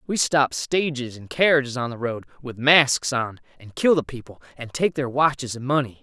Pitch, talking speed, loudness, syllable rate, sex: 130 Hz, 210 wpm, -22 LUFS, 5.1 syllables/s, male